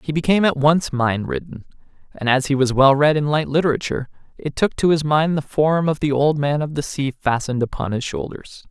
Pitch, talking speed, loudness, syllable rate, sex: 145 Hz, 230 wpm, -19 LUFS, 5.6 syllables/s, male